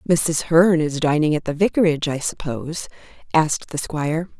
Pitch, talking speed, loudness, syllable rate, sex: 155 Hz, 165 wpm, -20 LUFS, 5.5 syllables/s, female